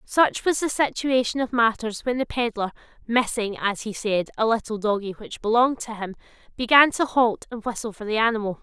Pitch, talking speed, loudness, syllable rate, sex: 230 Hz, 195 wpm, -23 LUFS, 5.4 syllables/s, female